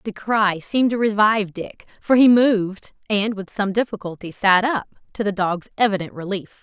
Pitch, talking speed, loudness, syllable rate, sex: 205 Hz, 180 wpm, -20 LUFS, 5.1 syllables/s, female